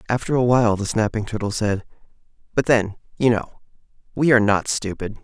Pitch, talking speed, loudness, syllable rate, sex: 110 Hz, 170 wpm, -20 LUFS, 5.8 syllables/s, male